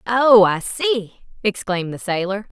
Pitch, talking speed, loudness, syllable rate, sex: 210 Hz, 140 wpm, -18 LUFS, 4.4 syllables/s, female